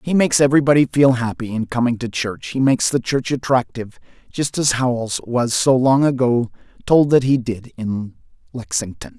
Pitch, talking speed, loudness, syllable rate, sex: 125 Hz, 175 wpm, -18 LUFS, 5.3 syllables/s, male